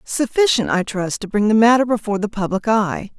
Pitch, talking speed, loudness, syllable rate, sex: 215 Hz, 205 wpm, -18 LUFS, 5.6 syllables/s, female